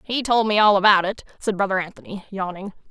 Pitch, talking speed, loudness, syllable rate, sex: 200 Hz, 205 wpm, -20 LUFS, 6.2 syllables/s, female